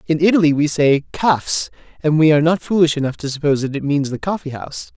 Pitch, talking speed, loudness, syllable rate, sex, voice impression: 155 Hz, 240 wpm, -17 LUFS, 6.6 syllables/s, male, very masculine, middle-aged, slightly thick, tensed, slightly powerful, bright, slightly soft, clear, fluent, slightly raspy, cool, intellectual, very refreshing, sincere, calm, slightly mature, very friendly, very reassuring, slightly unique, slightly elegant, wild, sweet, lively, kind